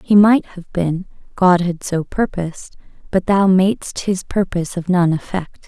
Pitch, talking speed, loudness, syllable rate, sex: 180 Hz, 170 wpm, -18 LUFS, 4.5 syllables/s, female